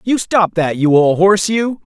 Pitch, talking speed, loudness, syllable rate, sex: 190 Hz, 215 wpm, -14 LUFS, 5.2 syllables/s, male